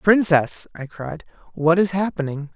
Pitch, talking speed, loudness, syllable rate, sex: 165 Hz, 140 wpm, -20 LUFS, 4.2 syllables/s, male